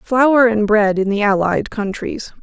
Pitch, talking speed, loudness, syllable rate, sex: 215 Hz, 175 wpm, -16 LUFS, 3.9 syllables/s, female